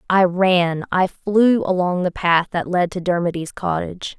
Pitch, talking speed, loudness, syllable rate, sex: 180 Hz, 170 wpm, -19 LUFS, 4.4 syllables/s, female